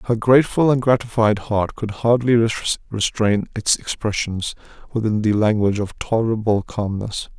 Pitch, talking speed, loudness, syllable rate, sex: 110 Hz, 130 wpm, -19 LUFS, 4.6 syllables/s, male